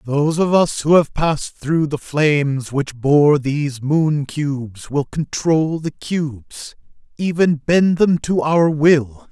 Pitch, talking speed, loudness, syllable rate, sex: 150 Hz, 155 wpm, -17 LUFS, 3.7 syllables/s, male